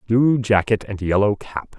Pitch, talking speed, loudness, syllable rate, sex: 105 Hz, 170 wpm, -19 LUFS, 4.3 syllables/s, male